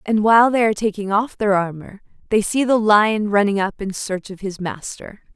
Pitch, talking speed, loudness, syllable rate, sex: 210 Hz, 215 wpm, -18 LUFS, 5.1 syllables/s, female